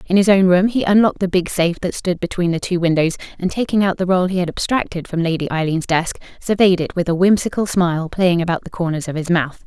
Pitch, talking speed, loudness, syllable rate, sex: 180 Hz, 250 wpm, -18 LUFS, 6.2 syllables/s, female